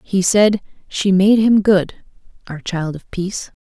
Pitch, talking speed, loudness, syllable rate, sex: 190 Hz, 150 wpm, -16 LUFS, 4.1 syllables/s, female